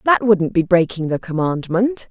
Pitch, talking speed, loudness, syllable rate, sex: 190 Hz, 170 wpm, -18 LUFS, 4.5 syllables/s, female